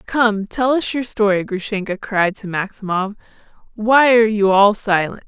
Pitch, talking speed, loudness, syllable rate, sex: 210 Hz, 160 wpm, -17 LUFS, 4.6 syllables/s, female